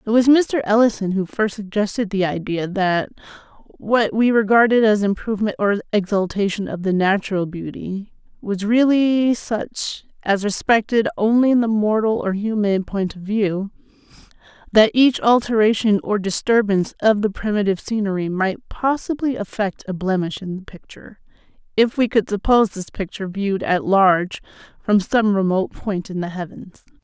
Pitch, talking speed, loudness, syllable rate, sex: 210 Hz, 150 wpm, -19 LUFS, 4.9 syllables/s, female